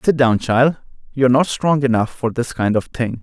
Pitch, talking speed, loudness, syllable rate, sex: 125 Hz, 240 wpm, -17 LUFS, 5.3 syllables/s, male